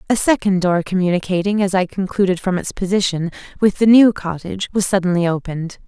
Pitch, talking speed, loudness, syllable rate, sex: 190 Hz, 175 wpm, -17 LUFS, 6.0 syllables/s, female